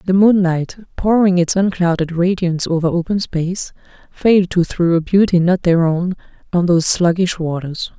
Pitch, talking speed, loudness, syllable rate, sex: 180 Hz, 160 wpm, -16 LUFS, 5.1 syllables/s, female